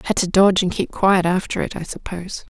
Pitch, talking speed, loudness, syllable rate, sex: 190 Hz, 235 wpm, -19 LUFS, 6.1 syllables/s, female